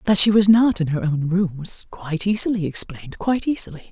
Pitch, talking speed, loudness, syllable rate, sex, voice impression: 180 Hz, 200 wpm, -20 LUFS, 6.0 syllables/s, female, feminine, very adult-like, fluent, slightly intellectual, calm